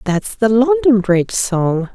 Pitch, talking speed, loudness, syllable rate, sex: 220 Hz, 155 wpm, -15 LUFS, 3.9 syllables/s, female